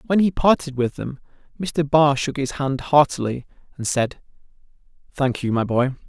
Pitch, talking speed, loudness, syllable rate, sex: 140 Hz, 170 wpm, -21 LUFS, 4.7 syllables/s, male